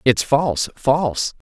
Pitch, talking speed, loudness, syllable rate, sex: 130 Hz, 120 wpm, -19 LUFS, 4.1 syllables/s, male